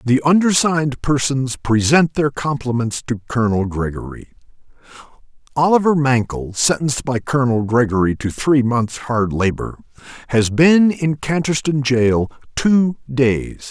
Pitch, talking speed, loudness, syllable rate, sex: 130 Hz, 120 wpm, -17 LUFS, 4.5 syllables/s, male